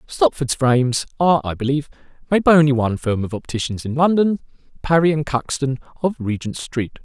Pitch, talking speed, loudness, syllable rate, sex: 140 Hz, 170 wpm, -19 LUFS, 5.8 syllables/s, male